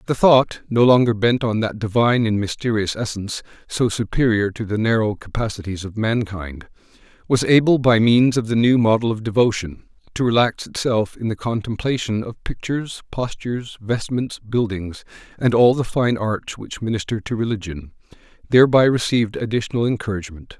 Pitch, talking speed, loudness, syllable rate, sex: 110 Hz, 155 wpm, -19 LUFS, 5.3 syllables/s, male